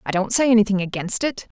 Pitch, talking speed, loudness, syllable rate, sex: 215 Hz, 225 wpm, -19 LUFS, 6.4 syllables/s, female